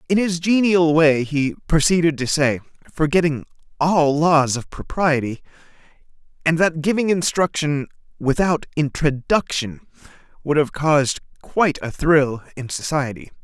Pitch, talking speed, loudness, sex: 155 Hz, 120 wpm, -19 LUFS, male